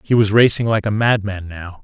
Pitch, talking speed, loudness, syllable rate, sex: 105 Hz, 230 wpm, -16 LUFS, 5.2 syllables/s, male